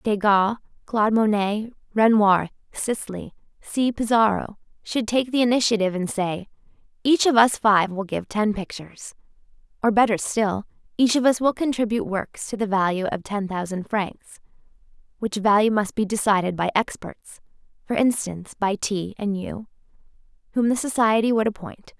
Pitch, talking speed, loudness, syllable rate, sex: 215 Hz, 145 wpm, -22 LUFS, 4.9 syllables/s, female